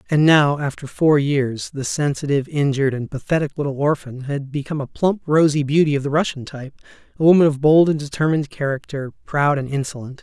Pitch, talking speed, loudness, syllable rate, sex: 145 Hz, 190 wpm, -19 LUFS, 6.0 syllables/s, male